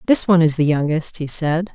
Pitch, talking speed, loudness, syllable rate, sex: 160 Hz, 240 wpm, -17 LUFS, 5.7 syllables/s, female